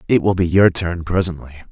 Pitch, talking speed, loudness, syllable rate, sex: 85 Hz, 210 wpm, -17 LUFS, 5.9 syllables/s, male